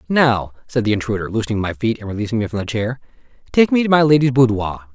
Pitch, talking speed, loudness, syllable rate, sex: 115 Hz, 230 wpm, -18 LUFS, 6.8 syllables/s, male